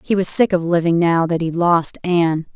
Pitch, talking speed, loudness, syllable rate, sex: 170 Hz, 235 wpm, -17 LUFS, 5.1 syllables/s, female